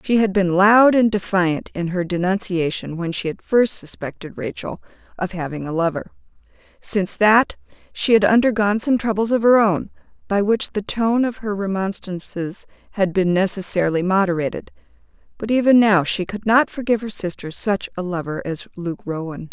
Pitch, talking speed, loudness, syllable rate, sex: 195 Hz, 170 wpm, -19 LUFS, 5.2 syllables/s, female